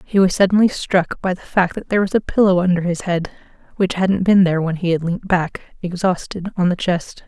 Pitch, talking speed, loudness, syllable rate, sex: 180 Hz, 230 wpm, -18 LUFS, 5.6 syllables/s, female